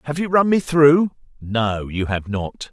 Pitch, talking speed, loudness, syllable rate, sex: 135 Hz, 175 wpm, -19 LUFS, 3.9 syllables/s, male